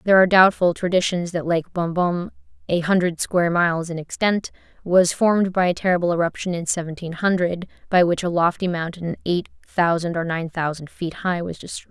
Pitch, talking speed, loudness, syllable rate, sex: 175 Hz, 180 wpm, -21 LUFS, 5.6 syllables/s, female